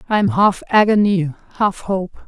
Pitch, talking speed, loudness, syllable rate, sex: 200 Hz, 160 wpm, -17 LUFS, 4.7 syllables/s, female